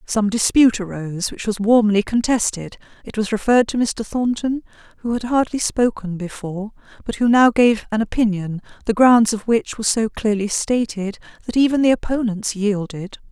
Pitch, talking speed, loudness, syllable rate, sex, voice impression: 220 Hz, 165 wpm, -19 LUFS, 5.2 syllables/s, female, very feminine, adult-like, very thin, tensed, very powerful, dark, slightly hard, soft, clear, fluent, slightly raspy, cute, very intellectual, refreshing, very sincere, calm, very friendly, very reassuring, unique, elegant, wild, sweet, lively, strict, intense, sharp